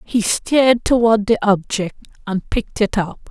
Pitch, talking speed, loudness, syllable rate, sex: 215 Hz, 165 wpm, -17 LUFS, 4.6 syllables/s, female